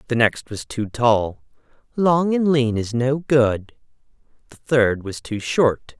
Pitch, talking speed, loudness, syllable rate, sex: 125 Hz, 160 wpm, -20 LUFS, 3.5 syllables/s, male